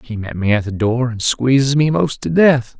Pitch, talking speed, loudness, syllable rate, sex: 125 Hz, 260 wpm, -16 LUFS, 4.8 syllables/s, male